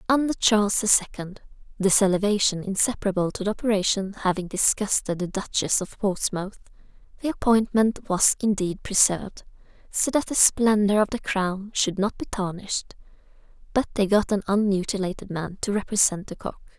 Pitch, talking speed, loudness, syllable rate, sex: 200 Hz, 150 wpm, -23 LUFS, 5.3 syllables/s, female